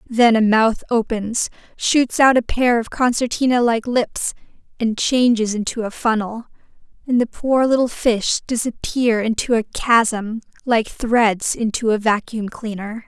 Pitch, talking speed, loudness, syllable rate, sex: 230 Hz, 145 wpm, -18 LUFS, 4.1 syllables/s, female